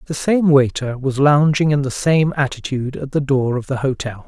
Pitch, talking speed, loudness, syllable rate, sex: 140 Hz, 210 wpm, -17 LUFS, 5.1 syllables/s, male